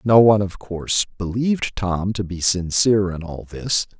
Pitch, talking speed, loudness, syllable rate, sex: 100 Hz, 180 wpm, -20 LUFS, 5.0 syllables/s, male